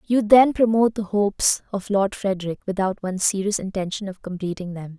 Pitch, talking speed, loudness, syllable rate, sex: 200 Hz, 180 wpm, -21 LUFS, 5.7 syllables/s, female